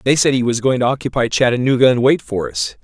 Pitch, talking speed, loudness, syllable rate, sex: 120 Hz, 255 wpm, -16 LUFS, 6.3 syllables/s, male